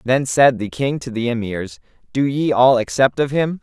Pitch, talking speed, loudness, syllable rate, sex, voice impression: 125 Hz, 215 wpm, -18 LUFS, 4.7 syllables/s, male, masculine, adult-like, tensed, slightly powerful, bright, clear, slightly nasal, cool, sincere, calm, friendly, reassuring, lively, slightly kind, light